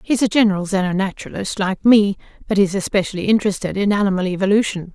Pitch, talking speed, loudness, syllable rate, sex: 200 Hz, 170 wpm, -18 LUFS, 6.8 syllables/s, female